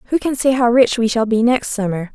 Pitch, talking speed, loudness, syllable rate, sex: 235 Hz, 280 wpm, -16 LUFS, 5.8 syllables/s, female